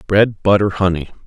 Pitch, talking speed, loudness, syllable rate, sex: 95 Hz, 140 wpm, -16 LUFS, 5.1 syllables/s, male